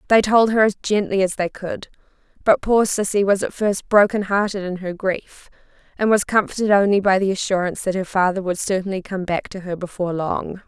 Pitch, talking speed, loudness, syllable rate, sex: 195 Hz, 210 wpm, -20 LUFS, 5.6 syllables/s, female